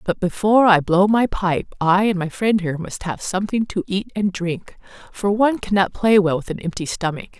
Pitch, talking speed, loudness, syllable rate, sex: 190 Hz, 220 wpm, -19 LUFS, 5.4 syllables/s, female